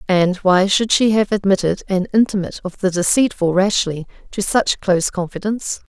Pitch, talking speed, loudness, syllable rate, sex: 195 Hz, 160 wpm, -17 LUFS, 5.3 syllables/s, female